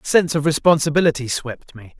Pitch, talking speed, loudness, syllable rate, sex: 145 Hz, 180 wpm, -18 LUFS, 6.5 syllables/s, male